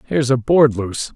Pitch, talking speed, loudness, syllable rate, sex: 125 Hz, 205 wpm, -16 LUFS, 5.7 syllables/s, male